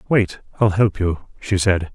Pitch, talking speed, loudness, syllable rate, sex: 100 Hz, 185 wpm, -20 LUFS, 4.1 syllables/s, male